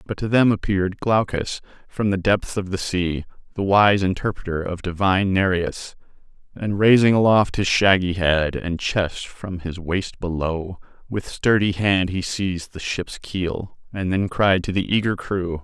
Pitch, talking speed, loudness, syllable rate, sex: 95 Hz, 170 wpm, -21 LUFS, 4.3 syllables/s, male